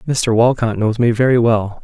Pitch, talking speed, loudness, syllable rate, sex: 115 Hz, 195 wpm, -15 LUFS, 4.8 syllables/s, male